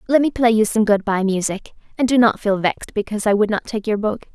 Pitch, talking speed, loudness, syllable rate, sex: 215 Hz, 275 wpm, -18 LUFS, 6.3 syllables/s, female